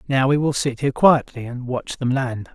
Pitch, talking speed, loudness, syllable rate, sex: 130 Hz, 235 wpm, -20 LUFS, 5.1 syllables/s, male